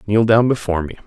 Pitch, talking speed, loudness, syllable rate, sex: 105 Hz, 225 wpm, -17 LUFS, 7.0 syllables/s, male